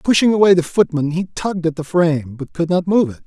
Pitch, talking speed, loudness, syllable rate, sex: 170 Hz, 255 wpm, -17 LUFS, 6.2 syllables/s, male